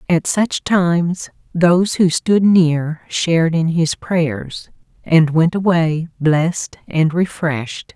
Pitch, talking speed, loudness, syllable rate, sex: 165 Hz, 130 wpm, -16 LUFS, 3.4 syllables/s, female